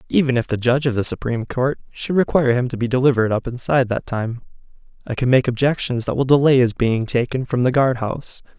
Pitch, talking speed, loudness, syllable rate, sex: 125 Hz, 225 wpm, -19 LUFS, 6.4 syllables/s, male